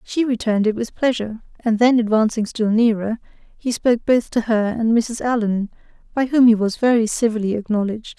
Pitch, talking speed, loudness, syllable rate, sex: 225 Hz, 185 wpm, -19 LUFS, 5.5 syllables/s, female